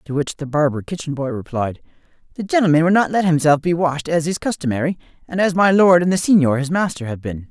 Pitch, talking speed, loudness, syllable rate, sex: 160 Hz, 230 wpm, -18 LUFS, 6.1 syllables/s, male